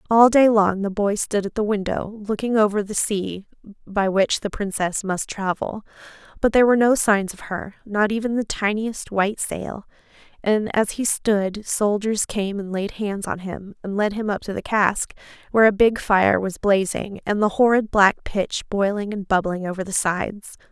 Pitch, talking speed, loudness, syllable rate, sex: 205 Hz, 195 wpm, -21 LUFS, 4.7 syllables/s, female